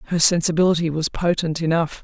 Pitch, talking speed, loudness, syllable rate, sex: 165 Hz, 150 wpm, -19 LUFS, 6.2 syllables/s, female